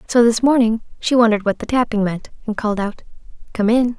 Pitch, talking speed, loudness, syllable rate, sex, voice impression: 225 Hz, 210 wpm, -18 LUFS, 6.3 syllables/s, female, very feminine, very young, very thin, tensed, slightly weak, very bright, slightly soft, very clear, fluent, very cute, intellectual, very refreshing, sincere, calm, very friendly, very reassuring, unique, very elegant, very sweet, very lively, very kind, sharp, slightly modest, very light